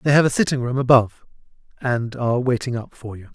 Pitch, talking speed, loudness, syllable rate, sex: 125 Hz, 215 wpm, -20 LUFS, 6.2 syllables/s, male